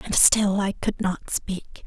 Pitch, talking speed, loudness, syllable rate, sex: 195 Hz, 195 wpm, -22 LUFS, 3.4 syllables/s, female